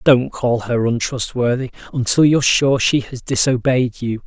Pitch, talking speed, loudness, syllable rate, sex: 125 Hz, 155 wpm, -17 LUFS, 4.6 syllables/s, male